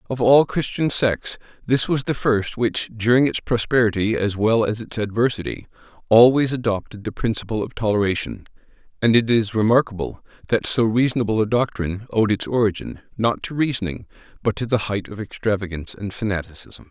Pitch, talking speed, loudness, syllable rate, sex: 110 Hz, 165 wpm, -21 LUFS, 5.5 syllables/s, male